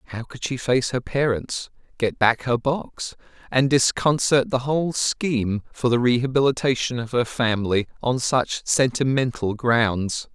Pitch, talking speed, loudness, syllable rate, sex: 125 Hz, 145 wpm, -22 LUFS, 4.4 syllables/s, male